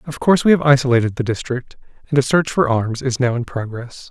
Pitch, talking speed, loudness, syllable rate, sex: 130 Hz, 235 wpm, -18 LUFS, 6.0 syllables/s, male